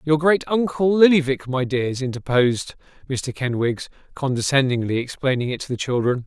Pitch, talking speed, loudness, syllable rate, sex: 135 Hz, 145 wpm, -21 LUFS, 5.2 syllables/s, male